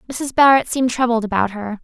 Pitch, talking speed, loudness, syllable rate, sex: 240 Hz, 195 wpm, -17 LUFS, 6.1 syllables/s, female